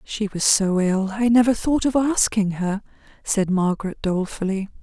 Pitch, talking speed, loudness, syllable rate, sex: 205 Hz, 160 wpm, -21 LUFS, 4.8 syllables/s, female